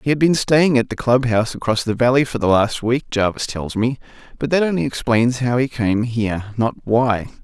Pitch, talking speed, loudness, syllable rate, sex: 120 Hz, 225 wpm, -18 LUFS, 5.4 syllables/s, male